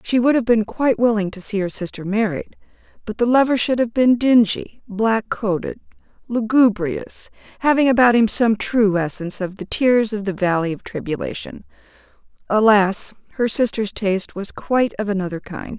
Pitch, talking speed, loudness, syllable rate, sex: 215 Hz, 165 wpm, -19 LUFS, 5.0 syllables/s, female